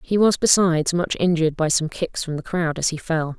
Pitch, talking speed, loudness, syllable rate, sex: 165 Hz, 250 wpm, -20 LUFS, 5.5 syllables/s, female